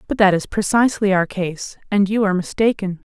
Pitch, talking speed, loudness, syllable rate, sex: 195 Hz, 195 wpm, -18 LUFS, 5.8 syllables/s, female